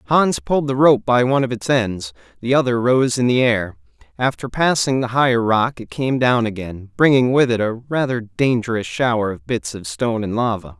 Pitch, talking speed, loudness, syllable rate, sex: 120 Hz, 205 wpm, -18 LUFS, 5.2 syllables/s, male